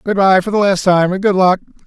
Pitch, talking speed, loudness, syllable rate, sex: 190 Hz, 290 wpm, -13 LUFS, 5.9 syllables/s, male